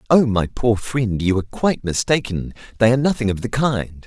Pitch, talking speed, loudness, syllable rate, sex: 115 Hz, 205 wpm, -19 LUFS, 5.6 syllables/s, male